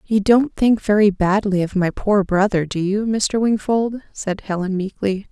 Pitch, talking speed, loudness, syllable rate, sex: 205 Hz, 180 wpm, -19 LUFS, 4.3 syllables/s, female